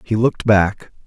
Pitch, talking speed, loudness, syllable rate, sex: 105 Hz, 170 wpm, -17 LUFS, 4.8 syllables/s, male